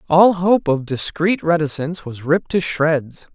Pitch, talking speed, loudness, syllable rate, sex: 165 Hz, 160 wpm, -18 LUFS, 4.5 syllables/s, male